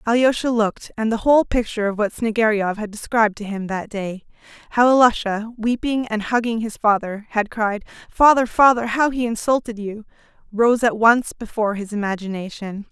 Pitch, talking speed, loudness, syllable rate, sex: 220 Hz, 165 wpm, -19 LUFS, 5.4 syllables/s, female